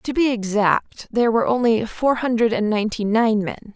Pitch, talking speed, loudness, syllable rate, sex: 225 Hz, 190 wpm, -20 LUFS, 5.2 syllables/s, female